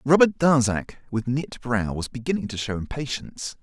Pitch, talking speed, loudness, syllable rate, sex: 125 Hz, 165 wpm, -24 LUFS, 5.0 syllables/s, male